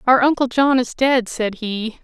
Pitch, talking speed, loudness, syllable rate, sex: 245 Hz, 205 wpm, -18 LUFS, 4.3 syllables/s, female